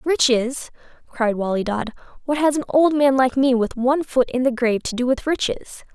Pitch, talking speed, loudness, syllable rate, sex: 260 Hz, 210 wpm, -20 LUFS, 5.2 syllables/s, female